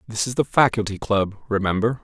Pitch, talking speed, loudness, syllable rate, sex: 110 Hz, 175 wpm, -21 LUFS, 5.6 syllables/s, male